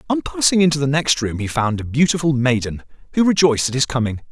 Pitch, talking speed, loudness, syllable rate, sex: 135 Hz, 220 wpm, -18 LUFS, 6.4 syllables/s, male